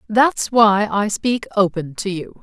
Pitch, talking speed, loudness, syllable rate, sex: 210 Hz, 175 wpm, -18 LUFS, 3.7 syllables/s, female